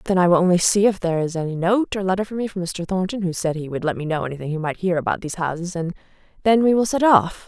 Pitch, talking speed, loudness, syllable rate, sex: 180 Hz, 295 wpm, -21 LUFS, 6.9 syllables/s, female